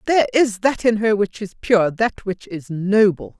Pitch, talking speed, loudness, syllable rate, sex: 210 Hz, 210 wpm, -19 LUFS, 4.4 syllables/s, female